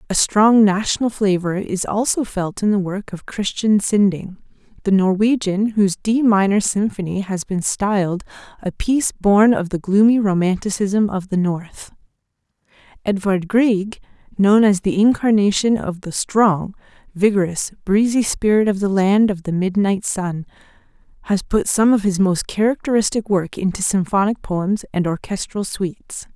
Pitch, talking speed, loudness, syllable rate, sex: 200 Hz, 150 wpm, -18 LUFS, 4.6 syllables/s, female